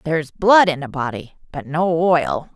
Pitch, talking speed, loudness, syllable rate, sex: 160 Hz, 190 wpm, -18 LUFS, 4.4 syllables/s, female